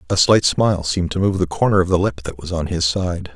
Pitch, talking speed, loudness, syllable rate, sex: 90 Hz, 285 wpm, -18 LUFS, 6.1 syllables/s, male